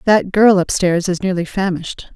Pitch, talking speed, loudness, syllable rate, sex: 185 Hz, 195 wpm, -16 LUFS, 5.1 syllables/s, female